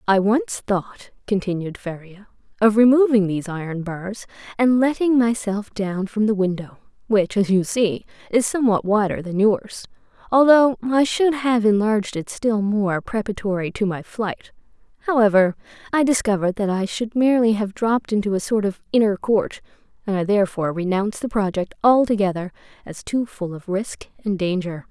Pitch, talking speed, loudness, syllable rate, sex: 210 Hz, 160 wpm, -20 LUFS, 5.1 syllables/s, female